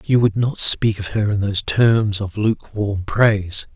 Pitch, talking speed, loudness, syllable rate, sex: 105 Hz, 190 wpm, -18 LUFS, 4.4 syllables/s, male